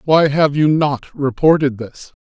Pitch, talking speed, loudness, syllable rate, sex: 145 Hz, 160 wpm, -15 LUFS, 3.9 syllables/s, male